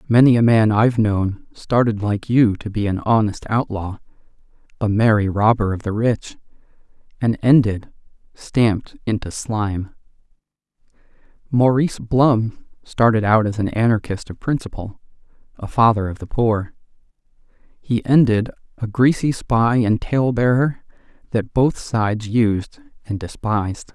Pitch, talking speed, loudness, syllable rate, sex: 110 Hz, 130 wpm, -19 LUFS, 4.4 syllables/s, male